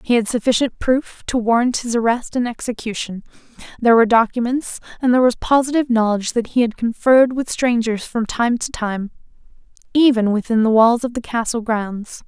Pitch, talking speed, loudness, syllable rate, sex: 235 Hz, 175 wpm, -18 LUFS, 5.6 syllables/s, female